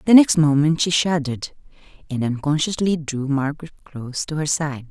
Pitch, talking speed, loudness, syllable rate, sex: 150 Hz, 160 wpm, -20 LUFS, 5.4 syllables/s, female